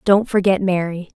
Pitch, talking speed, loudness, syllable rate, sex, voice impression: 190 Hz, 150 wpm, -18 LUFS, 5.0 syllables/s, female, feminine, adult-like, tensed, powerful, bright, clear, slightly fluent, slightly raspy, intellectual, calm, friendly, slightly lively, slightly sharp